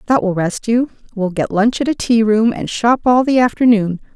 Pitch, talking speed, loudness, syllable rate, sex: 225 Hz, 230 wpm, -15 LUFS, 5.0 syllables/s, female